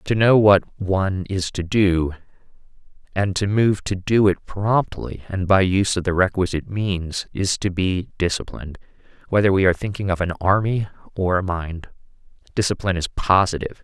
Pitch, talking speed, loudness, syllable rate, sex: 95 Hz, 165 wpm, -20 LUFS, 5.1 syllables/s, male